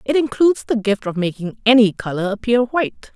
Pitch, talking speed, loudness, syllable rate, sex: 230 Hz, 190 wpm, -18 LUFS, 5.7 syllables/s, female